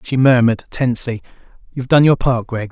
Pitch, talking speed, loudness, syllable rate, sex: 125 Hz, 200 wpm, -15 LUFS, 6.3 syllables/s, male